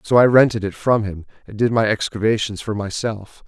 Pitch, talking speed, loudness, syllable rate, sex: 110 Hz, 205 wpm, -19 LUFS, 5.4 syllables/s, male